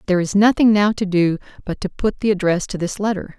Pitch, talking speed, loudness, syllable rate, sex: 195 Hz, 250 wpm, -18 LUFS, 6.1 syllables/s, female